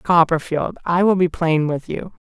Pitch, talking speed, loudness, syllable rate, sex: 170 Hz, 185 wpm, -19 LUFS, 4.4 syllables/s, male